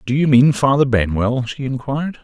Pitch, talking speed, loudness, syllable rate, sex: 130 Hz, 190 wpm, -16 LUFS, 5.3 syllables/s, male